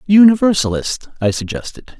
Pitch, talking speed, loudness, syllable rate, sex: 160 Hz, 90 wpm, -15 LUFS, 5.1 syllables/s, male